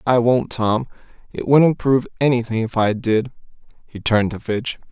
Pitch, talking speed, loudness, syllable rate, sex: 120 Hz, 170 wpm, -19 LUFS, 5.0 syllables/s, male